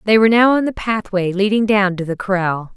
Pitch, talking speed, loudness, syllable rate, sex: 205 Hz, 240 wpm, -16 LUFS, 5.4 syllables/s, female